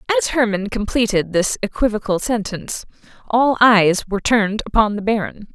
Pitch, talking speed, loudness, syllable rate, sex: 210 Hz, 140 wpm, -18 LUFS, 5.5 syllables/s, female